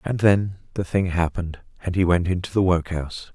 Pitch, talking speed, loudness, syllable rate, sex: 90 Hz, 195 wpm, -23 LUFS, 5.6 syllables/s, male